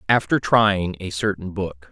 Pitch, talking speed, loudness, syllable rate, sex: 95 Hz, 155 wpm, -21 LUFS, 4.1 syllables/s, male